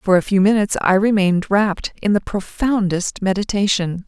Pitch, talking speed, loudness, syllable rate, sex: 200 Hz, 160 wpm, -18 LUFS, 5.4 syllables/s, female